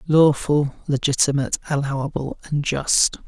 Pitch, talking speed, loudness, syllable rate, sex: 140 Hz, 90 wpm, -21 LUFS, 4.6 syllables/s, male